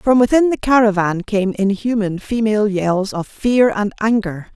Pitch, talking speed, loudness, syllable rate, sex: 210 Hz, 160 wpm, -17 LUFS, 4.5 syllables/s, female